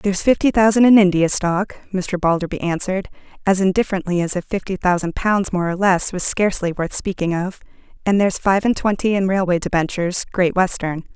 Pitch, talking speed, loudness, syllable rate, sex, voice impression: 185 Hz, 185 wpm, -18 LUFS, 5.8 syllables/s, female, feminine, adult-like, tensed, powerful, clear, fluent, intellectual, calm, elegant, lively, slightly strict, slightly sharp